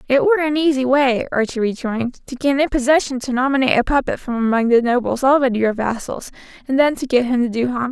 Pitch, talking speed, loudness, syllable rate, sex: 260 Hz, 225 wpm, -18 LUFS, 6.6 syllables/s, female